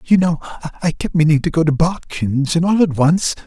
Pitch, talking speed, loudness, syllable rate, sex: 160 Hz, 225 wpm, -17 LUFS, 4.7 syllables/s, male